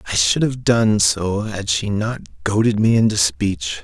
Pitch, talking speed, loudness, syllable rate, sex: 105 Hz, 190 wpm, -18 LUFS, 4.2 syllables/s, male